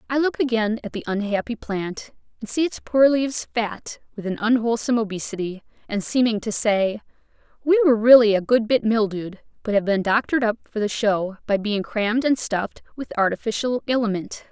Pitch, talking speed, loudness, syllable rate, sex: 225 Hz, 180 wpm, -21 LUFS, 5.7 syllables/s, female